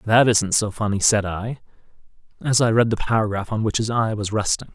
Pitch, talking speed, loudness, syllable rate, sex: 110 Hz, 215 wpm, -20 LUFS, 5.5 syllables/s, male